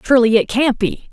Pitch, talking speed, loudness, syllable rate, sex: 240 Hz, 215 wpm, -15 LUFS, 6.2 syllables/s, female